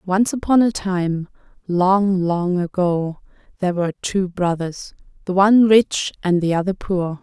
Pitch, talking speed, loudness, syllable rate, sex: 185 Hz, 150 wpm, -19 LUFS, 4.3 syllables/s, female